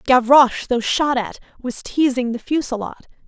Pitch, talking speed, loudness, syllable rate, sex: 250 Hz, 145 wpm, -18 LUFS, 5.5 syllables/s, female